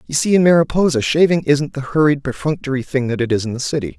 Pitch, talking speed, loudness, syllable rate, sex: 140 Hz, 240 wpm, -17 LUFS, 6.5 syllables/s, male